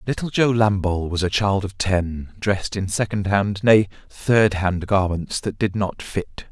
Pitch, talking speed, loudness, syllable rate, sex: 100 Hz, 175 wpm, -21 LUFS, 4.3 syllables/s, male